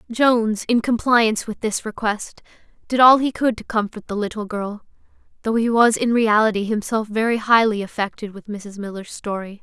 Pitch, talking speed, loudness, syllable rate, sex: 220 Hz, 175 wpm, -20 LUFS, 5.2 syllables/s, female